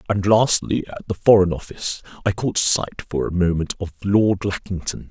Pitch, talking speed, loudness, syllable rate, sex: 95 Hz, 175 wpm, -20 LUFS, 5.1 syllables/s, male